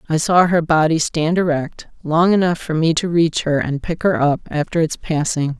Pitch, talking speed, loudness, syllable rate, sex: 160 Hz, 215 wpm, -17 LUFS, 4.8 syllables/s, female